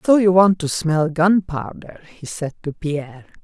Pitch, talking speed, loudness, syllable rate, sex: 170 Hz, 175 wpm, -18 LUFS, 4.4 syllables/s, female